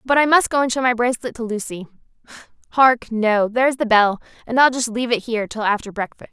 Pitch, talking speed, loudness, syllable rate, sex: 235 Hz, 230 wpm, -18 LUFS, 6.5 syllables/s, female